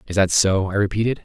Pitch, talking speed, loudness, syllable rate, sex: 100 Hz, 240 wpm, -19 LUFS, 6.4 syllables/s, male